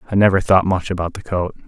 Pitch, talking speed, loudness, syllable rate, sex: 90 Hz, 250 wpm, -18 LUFS, 6.7 syllables/s, male